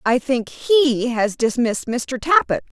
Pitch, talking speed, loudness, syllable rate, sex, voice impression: 255 Hz, 150 wpm, -19 LUFS, 3.9 syllables/s, female, very feminine, very adult-like, slightly clear, slightly intellectual, slightly elegant